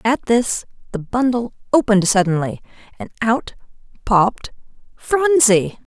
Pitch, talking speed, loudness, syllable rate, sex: 230 Hz, 90 wpm, -17 LUFS, 4.4 syllables/s, female